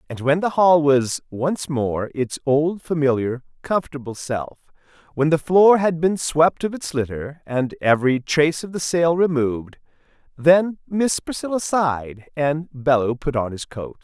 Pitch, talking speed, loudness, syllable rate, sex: 150 Hz, 160 wpm, -20 LUFS, 4.4 syllables/s, male